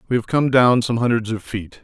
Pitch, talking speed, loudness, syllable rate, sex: 115 Hz, 260 wpm, -18 LUFS, 5.5 syllables/s, male